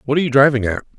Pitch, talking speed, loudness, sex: 135 Hz, 305 wpm, -15 LUFS, male